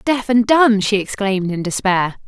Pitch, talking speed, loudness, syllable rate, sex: 210 Hz, 185 wpm, -16 LUFS, 4.8 syllables/s, female